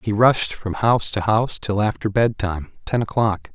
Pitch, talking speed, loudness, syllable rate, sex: 105 Hz, 170 wpm, -20 LUFS, 5.1 syllables/s, male